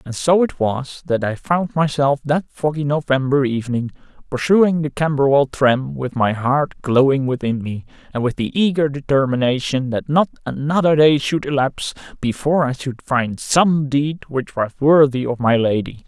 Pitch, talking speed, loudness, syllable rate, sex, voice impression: 140 Hz, 170 wpm, -18 LUFS, 4.7 syllables/s, male, masculine, very adult-like, middle-aged, thick, relaxed, slightly dark, hard, slightly muffled, fluent, slightly raspy, cool, intellectual, very sincere, calm, elegant, kind, slightly modest